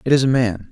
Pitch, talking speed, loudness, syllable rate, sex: 125 Hz, 335 wpm, -17 LUFS, 6.6 syllables/s, male